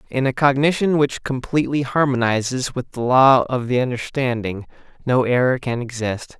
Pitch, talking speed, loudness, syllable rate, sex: 130 Hz, 150 wpm, -19 LUFS, 5.0 syllables/s, male